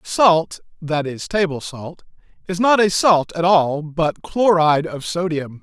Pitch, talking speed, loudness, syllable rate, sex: 165 Hz, 160 wpm, -18 LUFS, 3.5 syllables/s, male